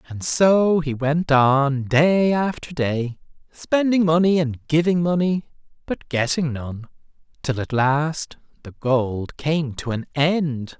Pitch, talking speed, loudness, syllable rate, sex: 150 Hz, 140 wpm, -20 LUFS, 3.4 syllables/s, male